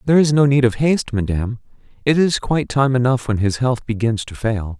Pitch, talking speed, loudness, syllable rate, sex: 125 Hz, 225 wpm, -18 LUFS, 6.0 syllables/s, male